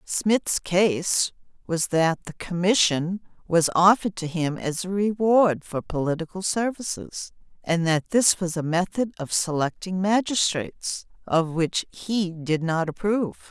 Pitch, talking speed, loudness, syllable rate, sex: 180 Hz, 140 wpm, -24 LUFS, 4.1 syllables/s, female